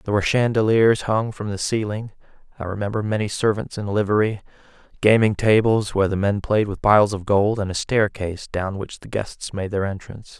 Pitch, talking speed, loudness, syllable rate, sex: 105 Hz, 190 wpm, -21 LUFS, 5.6 syllables/s, male